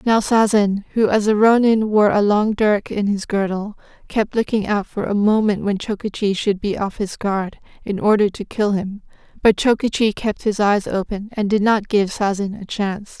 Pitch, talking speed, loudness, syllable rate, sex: 205 Hz, 200 wpm, -19 LUFS, 4.8 syllables/s, female